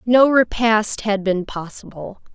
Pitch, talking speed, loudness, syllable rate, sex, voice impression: 215 Hz, 130 wpm, -18 LUFS, 3.7 syllables/s, female, feminine, adult-like, sincere, slightly calm, slightly elegant, slightly sweet